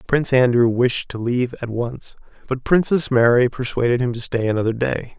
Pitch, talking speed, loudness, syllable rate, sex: 125 Hz, 185 wpm, -19 LUFS, 5.3 syllables/s, male